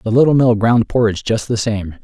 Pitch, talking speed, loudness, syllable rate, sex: 110 Hz, 235 wpm, -15 LUFS, 5.6 syllables/s, male